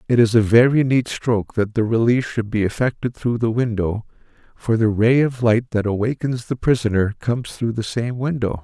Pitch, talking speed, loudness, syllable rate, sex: 115 Hz, 200 wpm, -19 LUFS, 5.3 syllables/s, male